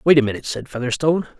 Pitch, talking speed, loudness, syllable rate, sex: 140 Hz, 215 wpm, -20 LUFS, 8.3 syllables/s, male